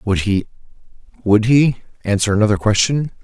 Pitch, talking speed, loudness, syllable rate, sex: 110 Hz, 95 wpm, -16 LUFS, 5.2 syllables/s, male